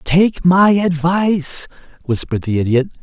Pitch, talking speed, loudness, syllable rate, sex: 165 Hz, 120 wpm, -15 LUFS, 4.5 syllables/s, male